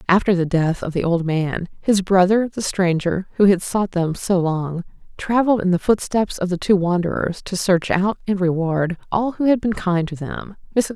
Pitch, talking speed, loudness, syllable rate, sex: 185 Hz, 205 wpm, -20 LUFS, 4.8 syllables/s, female